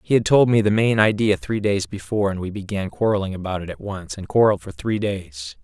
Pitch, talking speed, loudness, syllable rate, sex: 100 Hz, 245 wpm, -21 LUFS, 5.8 syllables/s, male